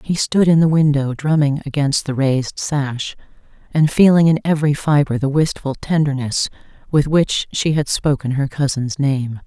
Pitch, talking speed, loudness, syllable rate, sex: 145 Hz, 165 wpm, -17 LUFS, 4.7 syllables/s, female